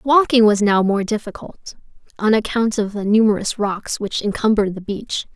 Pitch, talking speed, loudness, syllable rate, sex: 210 Hz, 170 wpm, -18 LUFS, 5.0 syllables/s, female